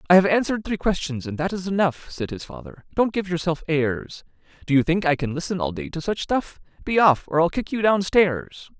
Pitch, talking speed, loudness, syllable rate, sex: 165 Hz, 240 wpm, -22 LUFS, 5.4 syllables/s, male